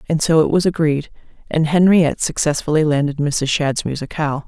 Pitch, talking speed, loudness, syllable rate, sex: 155 Hz, 160 wpm, -17 LUFS, 5.6 syllables/s, female